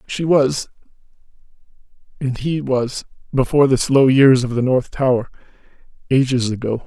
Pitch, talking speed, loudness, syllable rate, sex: 130 Hz, 105 wpm, -17 LUFS, 4.8 syllables/s, male